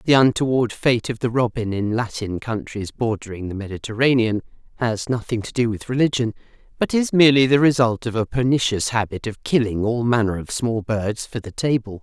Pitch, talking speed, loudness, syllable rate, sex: 115 Hz, 185 wpm, -21 LUFS, 5.4 syllables/s, female